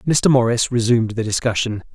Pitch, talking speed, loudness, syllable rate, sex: 120 Hz, 155 wpm, -18 LUFS, 5.8 syllables/s, male